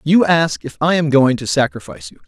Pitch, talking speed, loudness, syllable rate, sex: 155 Hz, 240 wpm, -15 LUFS, 5.7 syllables/s, male